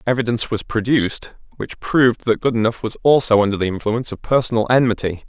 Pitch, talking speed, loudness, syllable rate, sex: 115 Hz, 170 wpm, -18 LUFS, 6.5 syllables/s, male